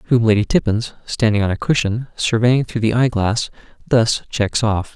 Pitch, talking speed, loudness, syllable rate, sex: 115 Hz, 180 wpm, -18 LUFS, 4.8 syllables/s, male